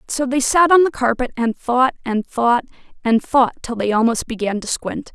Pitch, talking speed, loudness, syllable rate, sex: 245 Hz, 210 wpm, -18 LUFS, 4.8 syllables/s, female